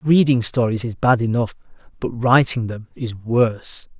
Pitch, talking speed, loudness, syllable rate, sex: 120 Hz, 150 wpm, -19 LUFS, 4.5 syllables/s, male